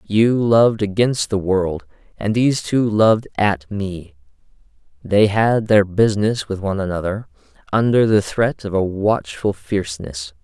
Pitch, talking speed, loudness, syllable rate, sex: 100 Hz, 145 wpm, -18 LUFS, 4.4 syllables/s, male